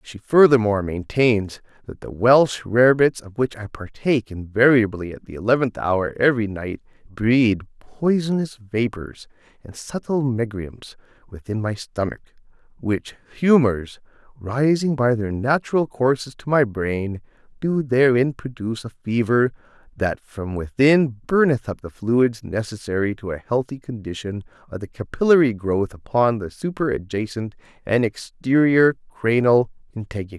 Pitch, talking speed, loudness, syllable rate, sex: 120 Hz, 130 wpm, -21 LUFS, 4.5 syllables/s, male